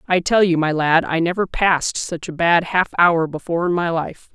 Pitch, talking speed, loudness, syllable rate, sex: 170 Hz, 235 wpm, -18 LUFS, 5.1 syllables/s, female